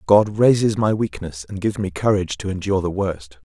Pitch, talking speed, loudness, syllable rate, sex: 95 Hz, 205 wpm, -20 LUFS, 5.8 syllables/s, male